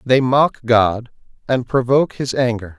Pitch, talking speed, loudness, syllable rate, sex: 120 Hz, 150 wpm, -17 LUFS, 4.4 syllables/s, male